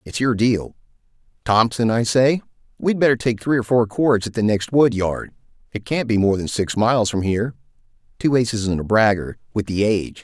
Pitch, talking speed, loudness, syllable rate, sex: 110 Hz, 180 wpm, -19 LUFS, 5.6 syllables/s, male